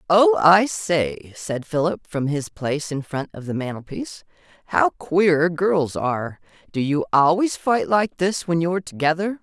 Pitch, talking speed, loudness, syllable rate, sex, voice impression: 165 Hz, 165 wpm, -21 LUFS, 4.4 syllables/s, female, feminine, very adult-like, clear, slightly intellectual, slightly elegant